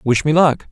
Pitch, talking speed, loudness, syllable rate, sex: 145 Hz, 255 wpm, -15 LUFS, 4.5 syllables/s, male